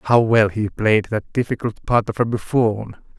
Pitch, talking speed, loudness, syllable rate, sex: 110 Hz, 170 wpm, -19 LUFS, 4.0 syllables/s, male